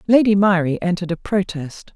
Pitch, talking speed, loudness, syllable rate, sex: 185 Hz, 155 wpm, -18 LUFS, 5.6 syllables/s, female